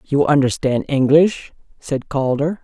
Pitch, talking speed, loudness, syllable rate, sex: 145 Hz, 115 wpm, -17 LUFS, 4.0 syllables/s, female